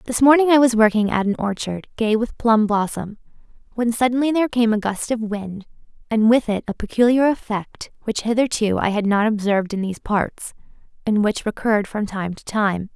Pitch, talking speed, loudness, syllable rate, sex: 220 Hz, 195 wpm, -20 LUFS, 5.3 syllables/s, female